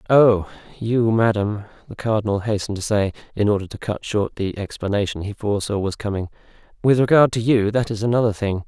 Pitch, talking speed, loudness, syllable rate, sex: 105 Hz, 185 wpm, -21 LUFS, 6.0 syllables/s, male